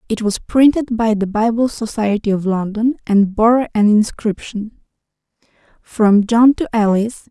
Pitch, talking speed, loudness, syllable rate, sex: 220 Hz, 140 wpm, -16 LUFS, 4.4 syllables/s, female